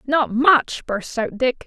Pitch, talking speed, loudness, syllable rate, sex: 255 Hz, 180 wpm, -19 LUFS, 3.3 syllables/s, female